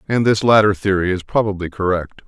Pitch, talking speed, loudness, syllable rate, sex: 100 Hz, 185 wpm, -17 LUFS, 5.8 syllables/s, male